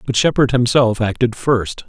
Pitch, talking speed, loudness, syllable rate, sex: 120 Hz, 160 wpm, -16 LUFS, 4.6 syllables/s, male